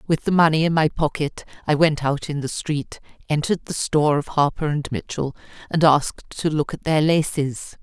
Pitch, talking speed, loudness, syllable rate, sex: 150 Hz, 200 wpm, -21 LUFS, 5.2 syllables/s, female